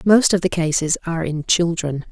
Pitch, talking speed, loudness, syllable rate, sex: 170 Hz, 200 wpm, -19 LUFS, 5.2 syllables/s, female